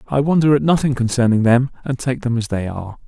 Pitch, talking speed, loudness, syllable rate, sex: 125 Hz, 235 wpm, -17 LUFS, 6.1 syllables/s, male